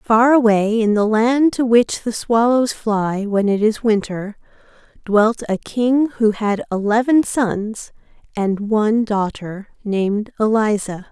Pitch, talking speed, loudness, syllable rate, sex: 220 Hz, 140 wpm, -17 LUFS, 3.7 syllables/s, female